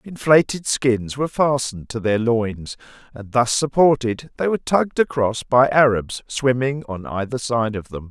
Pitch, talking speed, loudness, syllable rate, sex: 125 Hz, 165 wpm, -20 LUFS, 4.7 syllables/s, male